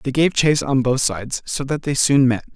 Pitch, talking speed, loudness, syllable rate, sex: 135 Hz, 260 wpm, -18 LUFS, 5.6 syllables/s, male